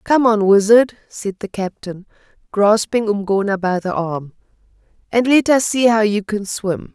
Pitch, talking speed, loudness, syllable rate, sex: 210 Hz, 165 wpm, -17 LUFS, 4.3 syllables/s, female